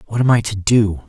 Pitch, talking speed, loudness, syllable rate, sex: 110 Hz, 280 wpm, -16 LUFS, 5.4 syllables/s, male